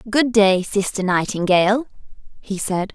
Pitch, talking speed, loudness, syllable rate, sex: 205 Hz, 120 wpm, -18 LUFS, 4.5 syllables/s, female